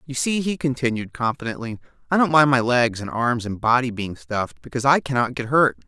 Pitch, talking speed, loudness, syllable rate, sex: 125 Hz, 215 wpm, -21 LUFS, 6.0 syllables/s, male